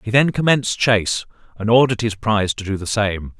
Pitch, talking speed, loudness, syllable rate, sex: 110 Hz, 210 wpm, -18 LUFS, 6.0 syllables/s, male